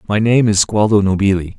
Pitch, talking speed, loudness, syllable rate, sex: 105 Hz, 190 wpm, -14 LUFS, 5.7 syllables/s, male